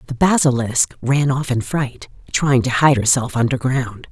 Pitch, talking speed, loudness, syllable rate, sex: 130 Hz, 160 wpm, -17 LUFS, 4.4 syllables/s, female